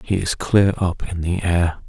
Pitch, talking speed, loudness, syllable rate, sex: 90 Hz, 225 wpm, -20 LUFS, 4.1 syllables/s, male